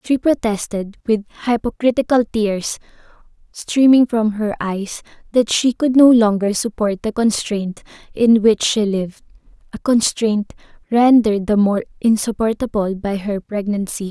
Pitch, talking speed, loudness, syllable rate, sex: 220 Hz, 130 wpm, -17 LUFS, 4.4 syllables/s, female